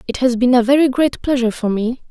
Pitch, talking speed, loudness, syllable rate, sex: 250 Hz, 255 wpm, -16 LUFS, 6.3 syllables/s, female